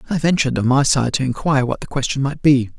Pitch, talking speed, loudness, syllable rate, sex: 135 Hz, 260 wpm, -18 LUFS, 6.7 syllables/s, male